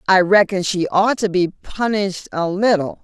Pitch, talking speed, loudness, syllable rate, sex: 190 Hz, 180 wpm, -18 LUFS, 4.6 syllables/s, female